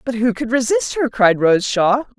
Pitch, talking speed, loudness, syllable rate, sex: 215 Hz, 220 wpm, -16 LUFS, 4.6 syllables/s, female